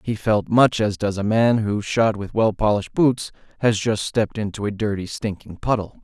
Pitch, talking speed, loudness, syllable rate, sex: 105 Hz, 210 wpm, -21 LUFS, 5.0 syllables/s, male